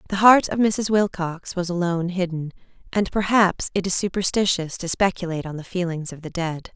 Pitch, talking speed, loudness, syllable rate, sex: 180 Hz, 185 wpm, -22 LUFS, 5.4 syllables/s, female